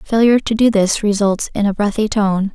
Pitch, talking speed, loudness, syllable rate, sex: 210 Hz, 210 wpm, -15 LUFS, 5.4 syllables/s, female